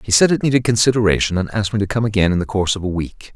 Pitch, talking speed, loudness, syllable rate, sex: 105 Hz, 305 wpm, -17 LUFS, 7.7 syllables/s, male